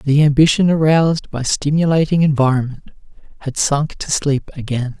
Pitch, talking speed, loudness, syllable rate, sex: 145 Hz, 130 wpm, -16 LUFS, 5.0 syllables/s, male